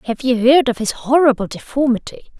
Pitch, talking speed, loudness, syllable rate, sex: 250 Hz, 175 wpm, -16 LUFS, 5.8 syllables/s, female